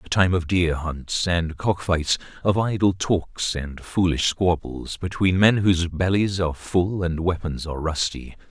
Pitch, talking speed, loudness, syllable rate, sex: 90 Hz, 170 wpm, -23 LUFS, 4.2 syllables/s, male